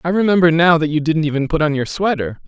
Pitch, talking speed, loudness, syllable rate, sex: 160 Hz, 265 wpm, -16 LUFS, 6.4 syllables/s, male